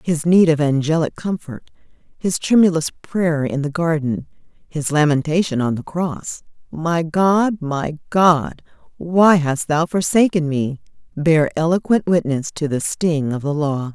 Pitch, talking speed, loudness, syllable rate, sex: 160 Hz, 145 wpm, -18 LUFS, 4.0 syllables/s, female